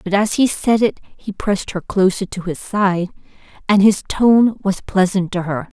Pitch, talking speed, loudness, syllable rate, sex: 195 Hz, 195 wpm, -17 LUFS, 4.5 syllables/s, female